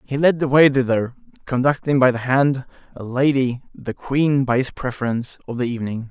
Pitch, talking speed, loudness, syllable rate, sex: 130 Hz, 185 wpm, -19 LUFS, 5.3 syllables/s, male